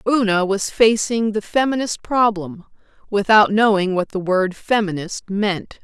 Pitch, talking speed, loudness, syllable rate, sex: 205 Hz, 135 wpm, -18 LUFS, 4.2 syllables/s, female